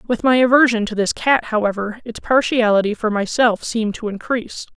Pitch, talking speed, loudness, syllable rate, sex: 225 Hz, 175 wpm, -17 LUFS, 5.5 syllables/s, female